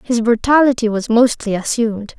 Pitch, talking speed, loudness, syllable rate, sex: 230 Hz, 140 wpm, -15 LUFS, 5.3 syllables/s, female